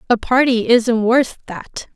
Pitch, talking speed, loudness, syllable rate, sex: 235 Hz, 155 wpm, -15 LUFS, 3.7 syllables/s, female